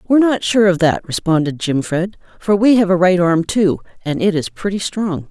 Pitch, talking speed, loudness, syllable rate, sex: 185 Hz, 225 wpm, -16 LUFS, 5.3 syllables/s, female